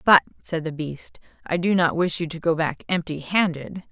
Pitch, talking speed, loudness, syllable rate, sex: 165 Hz, 215 wpm, -23 LUFS, 4.9 syllables/s, female